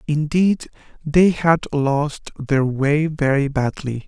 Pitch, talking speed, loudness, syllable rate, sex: 145 Hz, 120 wpm, -19 LUFS, 3.3 syllables/s, male